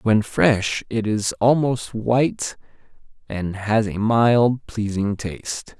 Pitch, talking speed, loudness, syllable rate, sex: 110 Hz, 125 wpm, -21 LUFS, 3.3 syllables/s, male